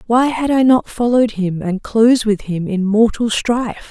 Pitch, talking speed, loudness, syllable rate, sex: 225 Hz, 200 wpm, -15 LUFS, 5.0 syllables/s, female